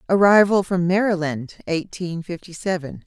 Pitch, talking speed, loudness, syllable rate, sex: 180 Hz, 120 wpm, -20 LUFS, 4.7 syllables/s, female